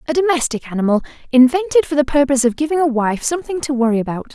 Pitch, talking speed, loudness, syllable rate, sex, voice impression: 275 Hz, 205 wpm, -17 LUFS, 7.4 syllables/s, female, feminine, adult-like, slightly relaxed, powerful, bright, soft, slightly raspy, intellectual, calm, friendly, reassuring, elegant, slightly lively, kind